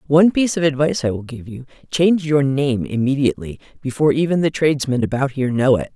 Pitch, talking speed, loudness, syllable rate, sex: 140 Hz, 200 wpm, -18 LUFS, 6.8 syllables/s, female